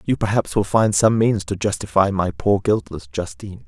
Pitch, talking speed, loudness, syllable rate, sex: 100 Hz, 195 wpm, -20 LUFS, 5.1 syllables/s, male